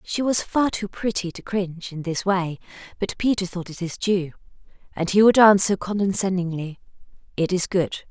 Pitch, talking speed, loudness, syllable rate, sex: 190 Hz, 180 wpm, -22 LUFS, 5.0 syllables/s, female